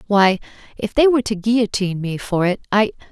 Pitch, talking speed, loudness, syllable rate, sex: 210 Hz, 195 wpm, -18 LUFS, 6.2 syllables/s, female